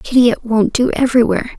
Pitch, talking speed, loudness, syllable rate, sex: 235 Hz, 190 wpm, -14 LUFS, 7.0 syllables/s, female